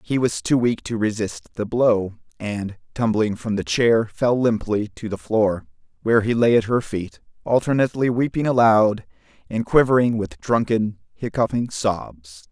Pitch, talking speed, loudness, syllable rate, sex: 110 Hz, 160 wpm, -21 LUFS, 4.5 syllables/s, male